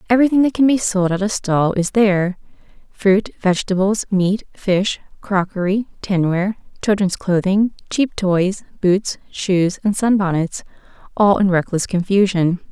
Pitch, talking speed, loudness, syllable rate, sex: 195 Hz, 140 wpm, -18 LUFS, 4.5 syllables/s, female